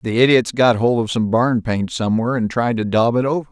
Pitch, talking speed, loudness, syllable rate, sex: 120 Hz, 255 wpm, -17 LUFS, 5.9 syllables/s, male